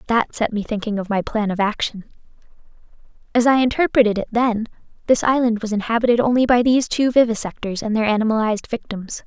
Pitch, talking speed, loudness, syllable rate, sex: 225 Hz, 175 wpm, -19 LUFS, 6.3 syllables/s, female